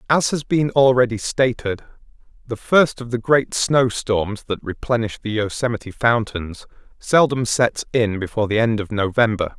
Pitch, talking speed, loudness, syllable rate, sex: 115 Hz, 155 wpm, -19 LUFS, 4.6 syllables/s, male